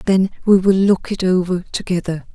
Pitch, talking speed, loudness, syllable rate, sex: 185 Hz, 180 wpm, -17 LUFS, 5.3 syllables/s, female